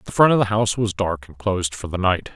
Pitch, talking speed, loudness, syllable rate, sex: 100 Hz, 305 wpm, -21 LUFS, 6.4 syllables/s, male